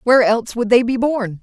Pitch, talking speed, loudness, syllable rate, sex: 235 Hz, 255 wpm, -16 LUFS, 6.0 syllables/s, female